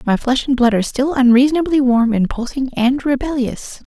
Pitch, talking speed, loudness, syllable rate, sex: 255 Hz, 185 wpm, -16 LUFS, 5.4 syllables/s, female